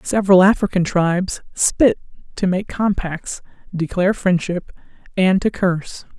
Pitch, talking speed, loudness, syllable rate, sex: 185 Hz, 115 wpm, -18 LUFS, 4.6 syllables/s, female